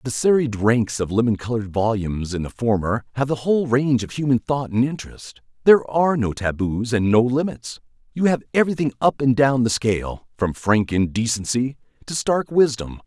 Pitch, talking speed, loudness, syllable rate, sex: 120 Hz, 185 wpm, -20 LUFS, 5.5 syllables/s, male